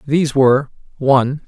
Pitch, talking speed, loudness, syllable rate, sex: 140 Hz, 120 wpm, -15 LUFS, 5.6 syllables/s, male